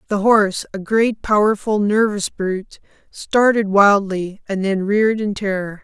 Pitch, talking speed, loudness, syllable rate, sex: 205 Hz, 145 wpm, -17 LUFS, 4.4 syllables/s, female